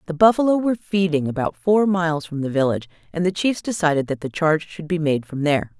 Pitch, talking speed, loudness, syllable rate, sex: 165 Hz, 230 wpm, -21 LUFS, 6.3 syllables/s, female